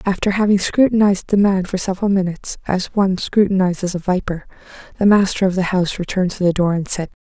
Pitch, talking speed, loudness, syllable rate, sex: 190 Hz, 200 wpm, -17 LUFS, 6.4 syllables/s, female